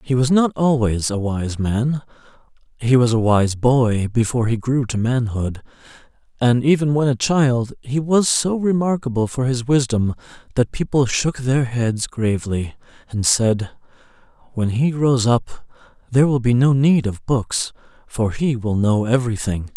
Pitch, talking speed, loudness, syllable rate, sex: 125 Hz, 160 wpm, -19 LUFS, 4.4 syllables/s, male